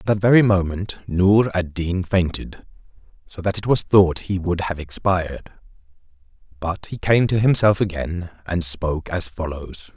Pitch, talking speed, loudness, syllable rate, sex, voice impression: 90 Hz, 155 wpm, -20 LUFS, 4.4 syllables/s, male, very masculine, very middle-aged, very thick, slightly tensed, very powerful, dark, slightly soft, muffled, fluent, raspy, very cool, intellectual, sincere, very calm, very mature, friendly, reassuring, very unique, elegant, wild, sweet, lively, kind, slightly modest